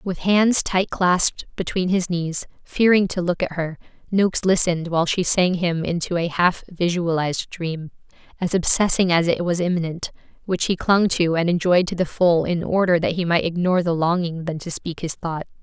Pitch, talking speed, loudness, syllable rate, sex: 175 Hz, 195 wpm, -21 LUFS, 5.1 syllables/s, female